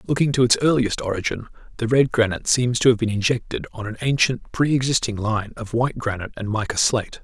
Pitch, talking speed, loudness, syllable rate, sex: 115 Hz, 200 wpm, -21 LUFS, 6.2 syllables/s, male